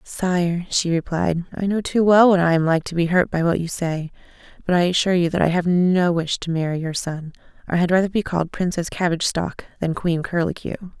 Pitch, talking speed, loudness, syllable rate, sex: 175 Hz, 230 wpm, -20 LUFS, 5.5 syllables/s, female